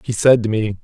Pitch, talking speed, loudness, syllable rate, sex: 115 Hz, 290 wpm, -16 LUFS, 5.7 syllables/s, male